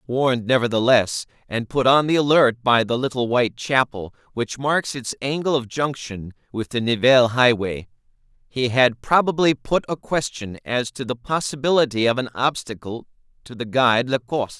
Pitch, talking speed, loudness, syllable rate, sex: 125 Hz, 160 wpm, -20 LUFS, 5.1 syllables/s, male